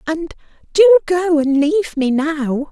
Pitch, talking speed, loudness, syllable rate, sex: 320 Hz, 155 wpm, -15 LUFS, 3.8 syllables/s, female